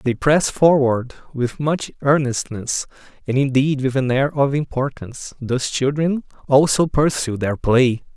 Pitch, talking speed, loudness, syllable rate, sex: 135 Hz, 140 wpm, -19 LUFS, 4.2 syllables/s, male